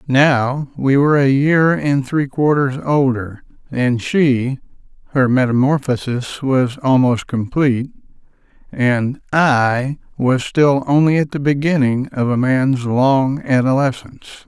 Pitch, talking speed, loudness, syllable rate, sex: 135 Hz, 115 wpm, -16 LUFS, 3.8 syllables/s, male